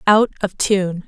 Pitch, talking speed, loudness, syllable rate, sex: 195 Hz, 170 wpm, -18 LUFS, 3.7 syllables/s, female